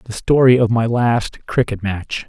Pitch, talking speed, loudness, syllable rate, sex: 115 Hz, 185 wpm, -17 LUFS, 4.0 syllables/s, male